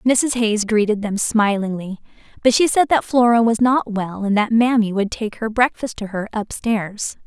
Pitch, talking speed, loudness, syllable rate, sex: 220 Hz, 200 wpm, -18 LUFS, 4.5 syllables/s, female